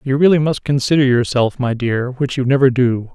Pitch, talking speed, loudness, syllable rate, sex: 130 Hz, 210 wpm, -16 LUFS, 5.4 syllables/s, male